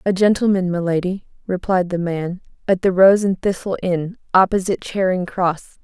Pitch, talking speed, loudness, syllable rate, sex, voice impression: 185 Hz, 165 wpm, -19 LUFS, 5.0 syllables/s, female, very feminine, adult-like, slightly thin, tensed, slightly weak, slightly bright, soft, clear, fluent, slightly raspy, cute, intellectual, slightly refreshing, sincere, very calm, friendly, very reassuring, unique, very elegant, sweet, slightly lively, kind, modest, light